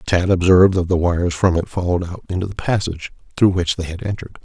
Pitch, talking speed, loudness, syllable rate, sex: 90 Hz, 230 wpm, -18 LUFS, 6.7 syllables/s, male